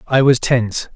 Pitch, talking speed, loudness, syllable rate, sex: 125 Hz, 190 wpm, -15 LUFS, 5.1 syllables/s, male